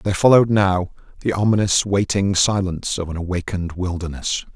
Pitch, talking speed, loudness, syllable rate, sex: 95 Hz, 145 wpm, -19 LUFS, 5.8 syllables/s, male